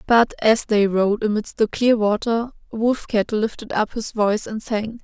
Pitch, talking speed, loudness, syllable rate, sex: 220 Hz, 180 wpm, -20 LUFS, 4.5 syllables/s, female